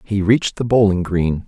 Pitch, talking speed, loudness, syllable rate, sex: 100 Hz, 205 wpm, -17 LUFS, 5.1 syllables/s, male